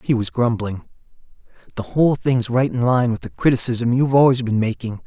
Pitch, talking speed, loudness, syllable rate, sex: 120 Hz, 190 wpm, -18 LUFS, 5.6 syllables/s, male